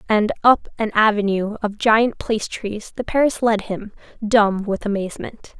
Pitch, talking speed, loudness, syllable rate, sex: 215 Hz, 160 wpm, -19 LUFS, 4.5 syllables/s, female